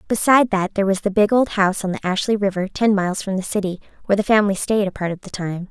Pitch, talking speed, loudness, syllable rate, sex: 200 Hz, 275 wpm, -19 LUFS, 7.0 syllables/s, female